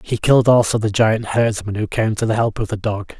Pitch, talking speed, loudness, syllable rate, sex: 110 Hz, 265 wpm, -17 LUFS, 5.6 syllables/s, male